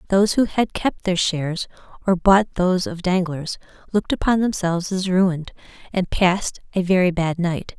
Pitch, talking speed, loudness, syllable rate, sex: 185 Hz, 170 wpm, -21 LUFS, 5.3 syllables/s, female